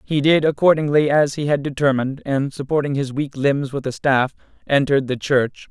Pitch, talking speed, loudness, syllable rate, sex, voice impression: 140 Hz, 190 wpm, -19 LUFS, 5.3 syllables/s, male, masculine, adult-like, clear, fluent, slightly raspy, intellectual, calm, friendly, reassuring, kind, slightly modest